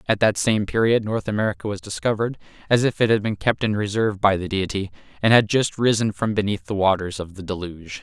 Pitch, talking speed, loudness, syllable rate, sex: 105 Hz, 225 wpm, -21 LUFS, 6.2 syllables/s, male